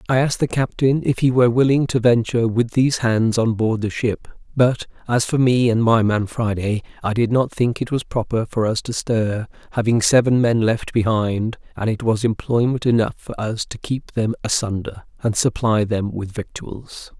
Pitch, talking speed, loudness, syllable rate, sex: 115 Hz, 200 wpm, -19 LUFS, 4.9 syllables/s, male